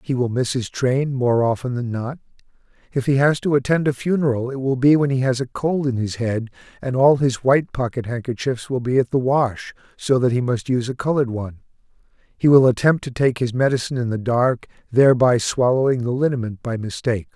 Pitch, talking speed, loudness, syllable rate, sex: 125 Hz, 215 wpm, -20 LUFS, 5.7 syllables/s, male